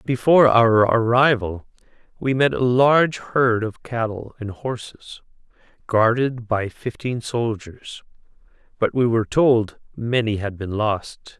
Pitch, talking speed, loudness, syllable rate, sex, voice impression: 115 Hz, 125 wpm, -20 LUFS, 3.9 syllables/s, male, masculine, very adult-like, slightly thick, cool, slightly intellectual, sincere, calm, slightly mature